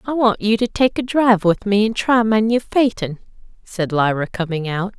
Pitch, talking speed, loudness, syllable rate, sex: 210 Hz, 215 wpm, -18 LUFS, 5.0 syllables/s, female